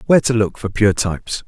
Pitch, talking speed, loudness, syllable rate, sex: 105 Hz, 245 wpm, -17 LUFS, 6.1 syllables/s, male